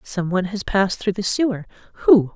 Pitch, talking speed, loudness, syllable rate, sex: 195 Hz, 205 wpm, -20 LUFS, 6.0 syllables/s, female